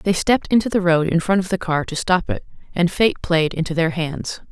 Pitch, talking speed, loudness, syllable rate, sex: 175 Hz, 250 wpm, -19 LUFS, 5.5 syllables/s, female